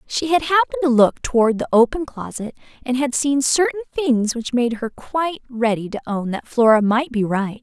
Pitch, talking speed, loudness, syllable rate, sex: 255 Hz, 205 wpm, -19 LUFS, 5.3 syllables/s, female